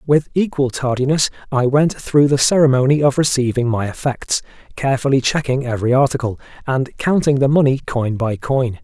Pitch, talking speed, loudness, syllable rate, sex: 135 Hz, 155 wpm, -17 LUFS, 5.4 syllables/s, male